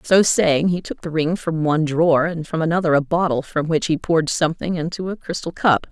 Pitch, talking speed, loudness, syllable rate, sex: 160 Hz, 235 wpm, -20 LUFS, 5.7 syllables/s, female